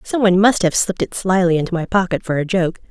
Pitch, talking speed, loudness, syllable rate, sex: 185 Hz, 270 wpm, -17 LUFS, 6.6 syllables/s, female